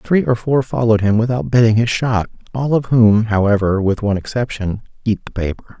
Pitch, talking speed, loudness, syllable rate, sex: 110 Hz, 195 wpm, -16 LUFS, 5.8 syllables/s, male